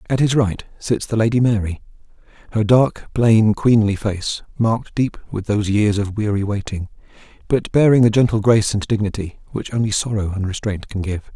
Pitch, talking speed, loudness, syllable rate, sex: 105 Hz, 180 wpm, -18 LUFS, 5.3 syllables/s, male